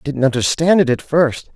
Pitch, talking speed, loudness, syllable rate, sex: 145 Hz, 230 wpm, -16 LUFS, 5.4 syllables/s, male